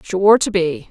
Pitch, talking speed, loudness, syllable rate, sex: 180 Hz, 200 wpm, -15 LUFS, 3.7 syllables/s, female